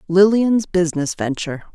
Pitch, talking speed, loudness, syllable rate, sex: 180 Hz, 105 wpm, -18 LUFS, 5.4 syllables/s, female